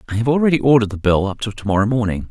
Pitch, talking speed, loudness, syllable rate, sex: 115 Hz, 260 wpm, -17 LUFS, 7.9 syllables/s, male